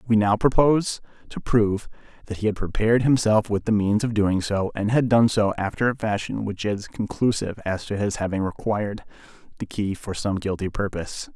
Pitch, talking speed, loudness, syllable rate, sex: 105 Hz, 195 wpm, -23 LUFS, 5.5 syllables/s, male